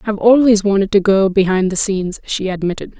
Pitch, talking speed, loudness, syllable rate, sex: 200 Hz, 200 wpm, -15 LUFS, 6.1 syllables/s, female